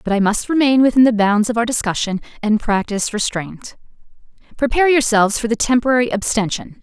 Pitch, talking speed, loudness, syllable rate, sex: 230 Hz, 165 wpm, -16 LUFS, 6.1 syllables/s, female